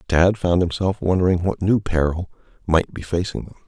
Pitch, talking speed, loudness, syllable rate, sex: 90 Hz, 180 wpm, -20 LUFS, 5.4 syllables/s, male